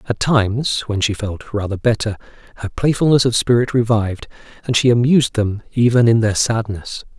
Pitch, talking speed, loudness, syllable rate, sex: 115 Hz, 165 wpm, -17 LUFS, 5.4 syllables/s, male